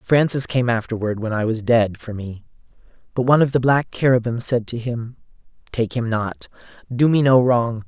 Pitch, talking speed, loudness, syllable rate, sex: 120 Hz, 190 wpm, -20 LUFS, 5.1 syllables/s, male